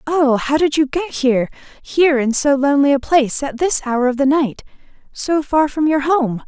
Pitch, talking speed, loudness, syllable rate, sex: 280 Hz, 205 wpm, -16 LUFS, 5.1 syllables/s, female